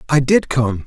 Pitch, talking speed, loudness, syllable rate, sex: 135 Hz, 210 wpm, -16 LUFS, 4.4 syllables/s, male